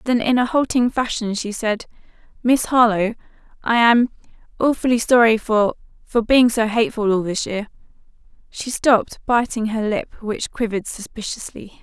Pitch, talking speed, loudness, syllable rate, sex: 225 Hz, 130 wpm, -19 LUFS, 5.0 syllables/s, female